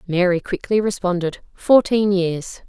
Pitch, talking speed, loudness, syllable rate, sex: 190 Hz, 110 wpm, -19 LUFS, 4.2 syllables/s, female